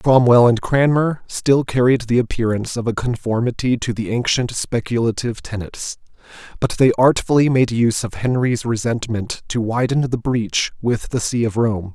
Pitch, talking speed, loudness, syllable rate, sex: 120 Hz, 160 wpm, -18 LUFS, 4.9 syllables/s, male